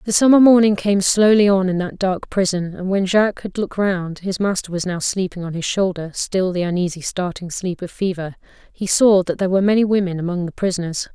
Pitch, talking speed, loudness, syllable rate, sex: 190 Hz, 210 wpm, -18 LUFS, 5.7 syllables/s, female